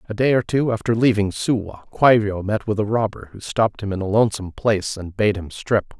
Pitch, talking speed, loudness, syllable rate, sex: 105 Hz, 230 wpm, -20 LUFS, 5.8 syllables/s, male